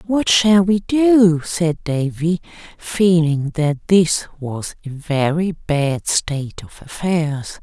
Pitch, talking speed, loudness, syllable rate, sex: 165 Hz, 125 wpm, -17 LUFS, 3.1 syllables/s, female